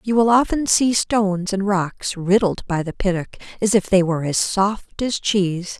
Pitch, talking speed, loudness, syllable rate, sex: 195 Hz, 195 wpm, -19 LUFS, 4.7 syllables/s, female